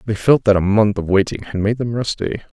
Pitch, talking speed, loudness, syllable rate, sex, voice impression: 105 Hz, 255 wpm, -17 LUFS, 5.8 syllables/s, male, masculine, adult-like, slightly thick, slightly fluent, cool, intellectual, slightly calm